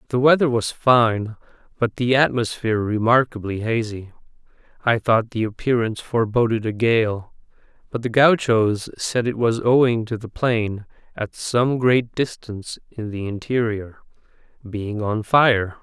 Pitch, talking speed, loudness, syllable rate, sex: 115 Hz, 135 wpm, -20 LUFS, 4.4 syllables/s, male